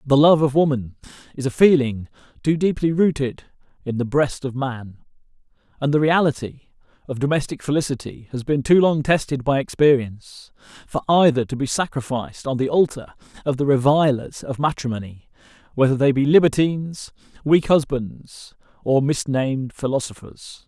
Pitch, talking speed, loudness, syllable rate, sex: 140 Hz, 145 wpm, -20 LUFS, 5.2 syllables/s, male